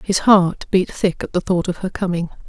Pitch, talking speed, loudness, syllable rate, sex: 185 Hz, 240 wpm, -18 LUFS, 5.0 syllables/s, female